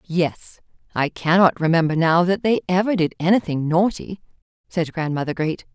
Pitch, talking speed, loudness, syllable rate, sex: 170 Hz, 145 wpm, -20 LUFS, 4.9 syllables/s, female